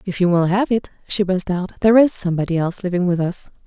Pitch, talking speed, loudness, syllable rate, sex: 185 Hz, 245 wpm, -18 LUFS, 6.7 syllables/s, female